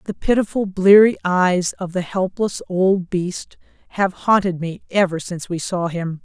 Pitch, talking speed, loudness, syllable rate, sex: 185 Hz, 165 wpm, -19 LUFS, 4.4 syllables/s, female